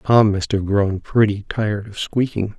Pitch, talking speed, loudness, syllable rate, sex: 105 Hz, 185 wpm, -19 LUFS, 4.6 syllables/s, male